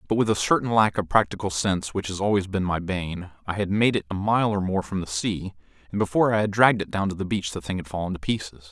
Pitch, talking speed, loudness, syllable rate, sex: 95 Hz, 280 wpm, -24 LUFS, 6.4 syllables/s, male